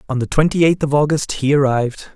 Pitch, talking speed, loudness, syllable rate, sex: 145 Hz, 225 wpm, -17 LUFS, 6.4 syllables/s, male